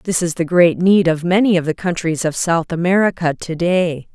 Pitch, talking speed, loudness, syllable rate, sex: 170 Hz, 205 wpm, -16 LUFS, 5.1 syllables/s, female